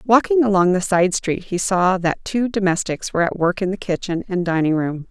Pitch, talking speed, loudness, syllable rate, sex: 185 Hz, 225 wpm, -19 LUFS, 5.3 syllables/s, female